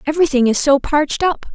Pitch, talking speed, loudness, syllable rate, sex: 295 Hz, 195 wpm, -15 LUFS, 6.5 syllables/s, female